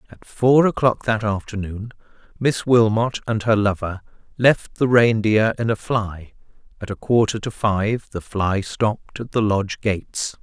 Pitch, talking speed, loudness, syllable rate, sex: 110 Hz, 160 wpm, -20 LUFS, 4.3 syllables/s, male